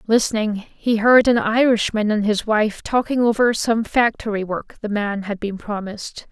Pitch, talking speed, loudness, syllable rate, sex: 220 Hz, 170 wpm, -19 LUFS, 4.5 syllables/s, female